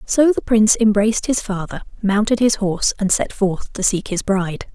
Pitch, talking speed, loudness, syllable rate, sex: 205 Hz, 200 wpm, -18 LUFS, 5.2 syllables/s, female